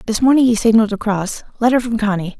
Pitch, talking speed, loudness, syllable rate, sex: 220 Hz, 200 wpm, -16 LUFS, 6.7 syllables/s, female